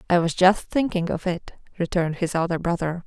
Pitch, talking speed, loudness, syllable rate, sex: 175 Hz, 195 wpm, -23 LUFS, 5.6 syllables/s, female